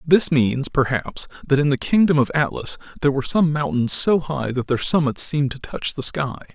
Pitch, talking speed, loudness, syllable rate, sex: 140 Hz, 210 wpm, -20 LUFS, 5.3 syllables/s, male